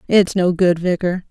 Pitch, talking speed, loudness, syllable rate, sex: 180 Hz, 185 wpm, -17 LUFS, 4.5 syllables/s, female